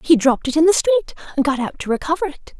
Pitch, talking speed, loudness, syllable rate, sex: 310 Hz, 275 wpm, -18 LUFS, 7.4 syllables/s, female